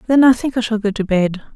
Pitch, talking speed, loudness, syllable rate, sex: 225 Hz, 310 wpm, -16 LUFS, 6.4 syllables/s, female